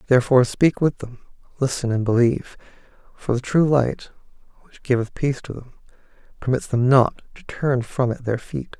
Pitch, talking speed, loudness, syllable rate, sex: 130 Hz, 170 wpm, -21 LUFS, 5.3 syllables/s, male